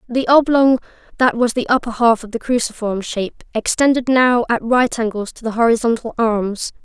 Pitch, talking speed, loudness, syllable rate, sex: 235 Hz, 175 wpm, -17 LUFS, 5.1 syllables/s, female